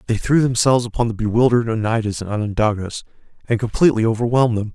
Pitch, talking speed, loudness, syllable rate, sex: 115 Hz, 165 wpm, -18 LUFS, 7.2 syllables/s, male